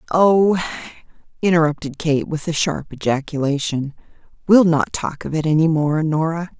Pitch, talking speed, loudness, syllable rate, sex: 160 Hz, 135 wpm, -18 LUFS, 5.0 syllables/s, female